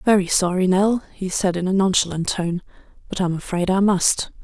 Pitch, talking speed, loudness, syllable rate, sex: 185 Hz, 190 wpm, -20 LUFS, 5.2 syllables/s, female